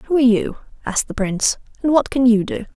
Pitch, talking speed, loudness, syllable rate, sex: 240 Hz, 235 wpm, -18 LUFS, 6.5 syllables/s, female